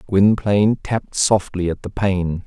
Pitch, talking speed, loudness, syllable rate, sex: 100 Hz, 145 wpm, -19 LUFS, 4.4 syllables/s, male